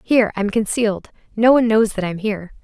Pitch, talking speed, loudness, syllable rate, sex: 215 Hz, 205 wpm, -18 LUFS, 6.4 syllables/s, female